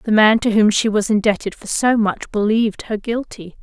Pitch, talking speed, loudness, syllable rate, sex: 215 Hz, 215 wpm, -17 LUFS, 5.2 syllables/s, female